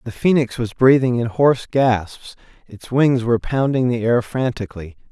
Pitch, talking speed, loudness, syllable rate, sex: 120 Hz, 165 wpm, -18 LUFS, 4.9 syllables/s, male